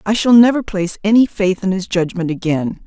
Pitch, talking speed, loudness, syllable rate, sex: 195 Hz, 210 wpm, -15 LUFS, 5.6 syllables/s, female